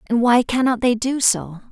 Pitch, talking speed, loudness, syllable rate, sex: 235 Hz, 210 wpm, -18 LUFS, 4.6 syllables/s, female